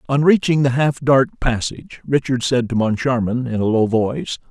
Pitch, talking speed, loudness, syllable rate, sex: 125 Hz, 185 wpm, -18 LUFS, 5.0 syllables/s, male